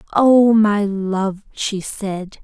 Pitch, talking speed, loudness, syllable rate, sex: 205 Hz, 125 wpm, -17 LUFS, 2.5 syllables/s, female